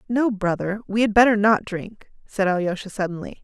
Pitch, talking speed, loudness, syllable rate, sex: 205 Hz, 175 wpm, -21 LUFS, 5.2 syllables/s, female